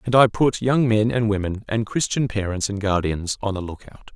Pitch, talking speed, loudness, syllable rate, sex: 110 Hz, 230 wpm, -21 LUFS, 5.3 syllables/s, male